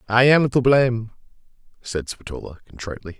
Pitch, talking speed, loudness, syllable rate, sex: 115 Hz, 130 wpm, -20 LUFS, 5.8 syllables/s, male